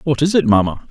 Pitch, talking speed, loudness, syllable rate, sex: 135 Hz, 265 wpm, -15 LUFS, 6.3 syllables/s, male